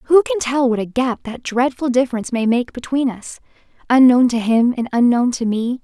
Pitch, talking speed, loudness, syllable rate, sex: 250 Hz, 205 wpm, -17 LUFS, 5.4 syllables/s, female